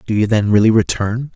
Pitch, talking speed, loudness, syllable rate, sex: 110 Hz, 220 wpm, -15 LUFS, 5.7 syllables/s, male